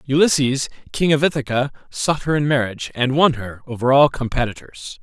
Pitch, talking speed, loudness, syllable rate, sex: 135 Hz, 165 wpm, -19 LUFS, 5.4 syllables/s, male